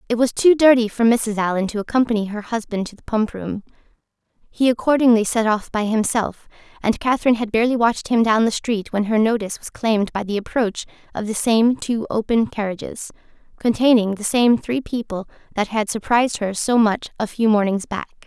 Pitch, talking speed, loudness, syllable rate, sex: 220 Hz, 195 wpm, -19 LUFS, 5.7 syllables/s, female